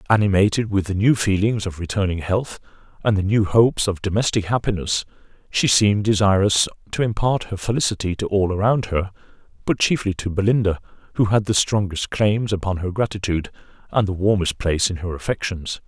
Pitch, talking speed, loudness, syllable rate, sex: 100 Hz, 170 wpm, -20 LUFS, 5.7 syllables/s, male